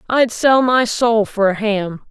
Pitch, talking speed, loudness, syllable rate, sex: 225 Hz, 200 wpm, -16 LUFS, 3.8 syllables/s, female